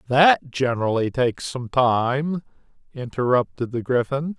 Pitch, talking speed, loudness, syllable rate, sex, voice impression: 130 Hz, 110 wpm, -22 LUFS, 4.3 syllables/s, male, very masculine, slightly old, thick, tensed, slightly powerful, bright, soft, slightly muffled, fluent, slightly raspy, cool, intellectual, slightly refreshing, sincere, calm, mature, friendly, reassuring, very unique, slightly elegant, wild, slightly sweet, very lively, kind, intense, sharp